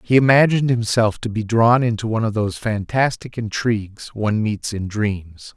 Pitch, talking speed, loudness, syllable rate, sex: 110 Hz, 175 wpm, -19 LUFS, 5.1 syllables/s, male